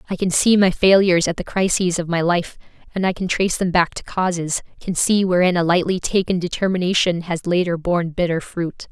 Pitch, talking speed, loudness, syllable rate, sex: 180 Hz, 210 wpm, -19 LUFS, 5.6 syllables/s, female